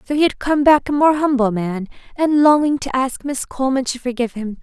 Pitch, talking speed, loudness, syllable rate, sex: 265 Hz, 235 wpm, -17 LUFS, 5.7 syllables/s, female